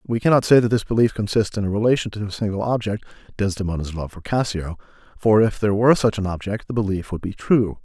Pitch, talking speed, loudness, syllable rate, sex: 105 Hz, 230 wpm, -21 LUFS, 6.5 syllables/s, male